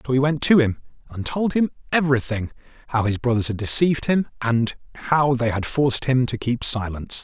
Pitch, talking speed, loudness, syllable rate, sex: 130 Hz, 200 wpm, -21 LUFS, 5.8 syllables/s, male